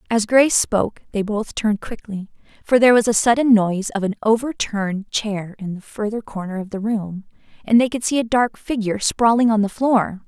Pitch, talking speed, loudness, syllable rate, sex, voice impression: 215 Hz, 205 wpm, -19 LUFS, 5.5 syllables/s, female, feminine, slightly adult-like, slightly tensed, clear, slightly fluent, cute, friendly, sweet, slightly kind